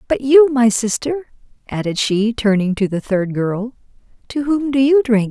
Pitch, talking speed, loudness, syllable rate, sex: 235 Hz, 180 wpm, -16 LUFS, 4.4 syllables/s, female